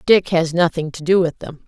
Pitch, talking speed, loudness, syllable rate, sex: 170 Hz, 250 wpm, -18 LUFS, 5.2 syllables/s, female